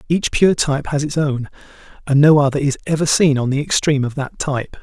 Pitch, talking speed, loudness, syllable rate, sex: 145 Hz, 225 wpm, -17 LUFS, 6.1 syllables/s, male